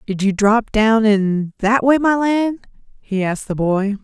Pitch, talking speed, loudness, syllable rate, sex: 220 Hz, 195 wpm, -17 LUFS, 4.2 syllables/s, female